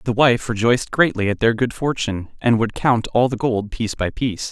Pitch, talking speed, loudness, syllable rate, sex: 115 Hz, 225 wpm, -19 LUFS, 5.6 syllables/s, male